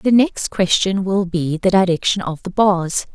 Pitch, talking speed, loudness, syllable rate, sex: 185 Hz, 190 wpm, -17 LUFS, 4.3 syllables/s, female